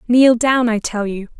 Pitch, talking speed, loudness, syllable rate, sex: 230 Hz, 215 wpm, -16 LUFS, 4.4 syllables/s, female